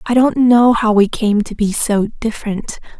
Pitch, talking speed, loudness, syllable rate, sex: 220 Hz, 200 wpm, -15 LUFS, 4.5 syllables/s, female